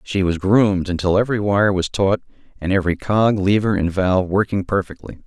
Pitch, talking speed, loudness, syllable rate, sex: 95 Hz, 180 wpm, -18 LUFS, 5.7 syllables/s, male